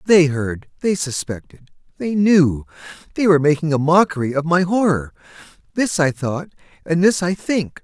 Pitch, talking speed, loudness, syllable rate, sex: 160 Hz, 130 wpm, -18 LUFS, 4.8 syllables/s, male